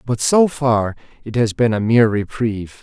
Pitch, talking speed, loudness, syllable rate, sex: 115 Hz, 190 wpm, -17 LUFS, 4.9 syllables/s, male